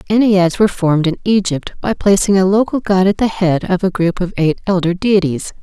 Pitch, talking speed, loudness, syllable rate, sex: 190 Hz, 215 wpm, -15 LUFS, 5.5 syllables/s, female